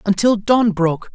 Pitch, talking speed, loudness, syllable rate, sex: 205 Hz, 155 wpm, -16 LUFS, 4.8 syllables/s, male